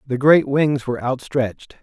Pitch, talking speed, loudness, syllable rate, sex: 130 Hz, 165 wpm, -19 LUFS, 4.9 syllables/s, male